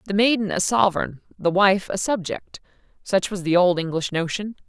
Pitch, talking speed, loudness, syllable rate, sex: 190 Hz, 180 wpm, -22 LUFS, 5.1 syllables/s, female